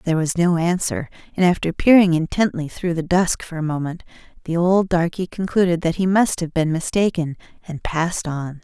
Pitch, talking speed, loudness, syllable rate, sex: 170 Hz, 190 wpm, -20 LUFS, 5.4 syllables/s, female